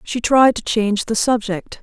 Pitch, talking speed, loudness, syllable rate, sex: 225 Hz, 195 wpm, -17 LUFS, 4.6 syllables/s, female